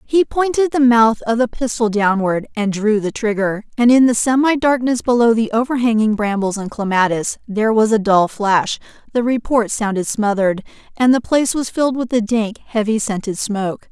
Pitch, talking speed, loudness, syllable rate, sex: 225 Hz, 185 wpm, -16 LUFS, 5.2 syllables/s, female